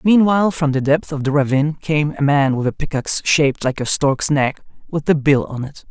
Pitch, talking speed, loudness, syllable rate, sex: 145 Hz, 235 wpm, -17 LUFS, 5.5 syllables/s, male